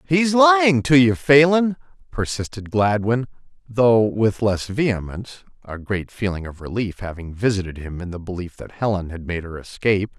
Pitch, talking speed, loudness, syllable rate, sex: 110 Hz, 165 wpm, -20 LUFS, 4.9 syllables/s, male